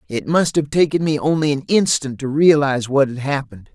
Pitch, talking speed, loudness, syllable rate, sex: 140 Hz, 210 wpm, -17 LUFS, 5.7 syllables/s, male